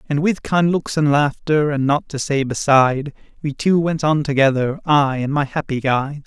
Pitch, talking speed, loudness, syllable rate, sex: 145 Hz, 200 wpm, -18 LUFS, 4.9 syllables/s, male